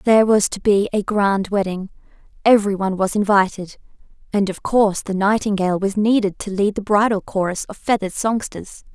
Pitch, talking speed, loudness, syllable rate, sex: 200 Hz, 175 wpm, -19 LUFS, 5.6 syllables/s, female